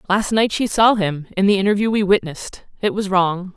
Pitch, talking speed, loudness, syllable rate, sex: 195 Hz, 220 wpm, -18 LUFS, 5.5 syllables/s, female